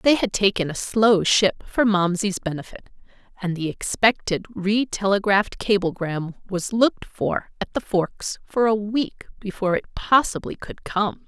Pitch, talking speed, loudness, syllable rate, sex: 200 Hz, 155 wpm, -22 LUFS, 4.4 syllables/s, female